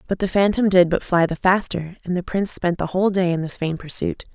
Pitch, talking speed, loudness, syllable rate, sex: 180 Hz, 260 wpm, -20 LUFS, 5.9 syllables/s, female